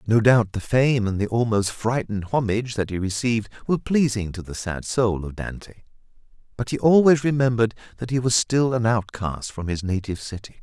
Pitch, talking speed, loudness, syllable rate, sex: 110 Hz, 190 wpm, -22 LUFS, 5.6 syllables/s, male